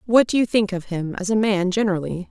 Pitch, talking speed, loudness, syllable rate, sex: 200 Hz, 260 wpm, -21 LUFS, 6.0 syllables/s, female